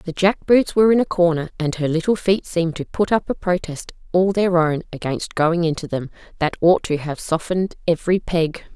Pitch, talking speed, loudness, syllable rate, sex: 170 Hz, 210 wpm, -20 LUFS, 5.4 syllables/s, female